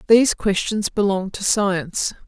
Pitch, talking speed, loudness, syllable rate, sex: 205 Hz, 130 wpm, -20 LUFS, 4.6 syllables/s, female